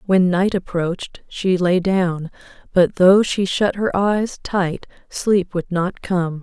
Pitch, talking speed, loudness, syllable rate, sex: 185 Hz, 160 wpm, -19 LUFS, 3.4 syllables/s, female